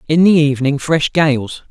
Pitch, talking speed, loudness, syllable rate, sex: 150 Hz, 175 wpm, -14 LUFS, 4.7 syllables/s, male